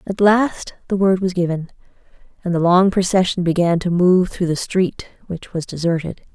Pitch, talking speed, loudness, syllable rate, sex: 180 Hz, 180 wpm, -18 LUFS, 5.0 syllables/s, female